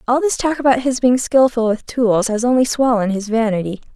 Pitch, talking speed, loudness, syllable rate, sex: 240 Hz, 210 wpm, -16 LUFS, 5.5 syllables/s, female